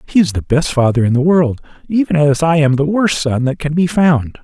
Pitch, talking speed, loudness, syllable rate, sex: 150 Hz, 255 wpm, -14 LUFS, 5.3 syllables/s, male